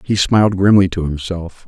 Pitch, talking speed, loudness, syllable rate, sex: 95 Hz, 180 wpm, -15 LUFS, 5.1 syllables/s, male